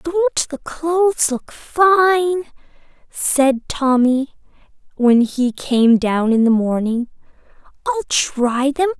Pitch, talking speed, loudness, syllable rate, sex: 285 Hz, 120 wpm, -17 LUFS, 3.5 syllables/s, female